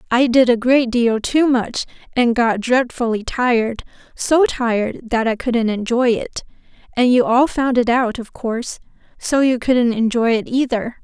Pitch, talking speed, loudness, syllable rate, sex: 240 Hz, 175 wpm, -17 LUFS, 4.4 syllables/s, female